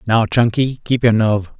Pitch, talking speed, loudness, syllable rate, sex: 115 Hz, 190 wpm, -16 LUFS, 5.1 syllables/s, male